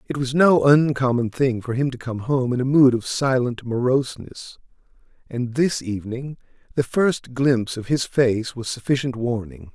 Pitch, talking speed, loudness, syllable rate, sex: 125 Hz, 170 wpm, -21 LUFS, 4.7 syllables/s, male